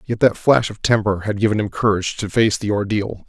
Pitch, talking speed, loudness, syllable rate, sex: 105 Hz, 240 wpm, -19 LUFS, 5.7 syllables/s, male